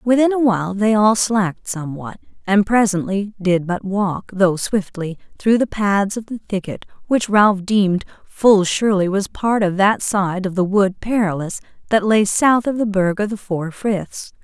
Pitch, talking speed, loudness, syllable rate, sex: 200 Hz, 185 wpm, -18 LUFS, 4.5 syllables/s, female